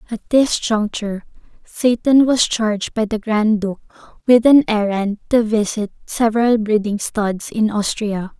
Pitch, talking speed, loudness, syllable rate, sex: 220 Hz, 145 wpm, -17 LUFS, 4.3 syllables/s, female